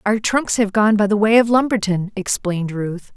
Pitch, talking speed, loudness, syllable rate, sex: 205 Hz, 210 wpm, -18 LUFS, 5.0 syllables/s, female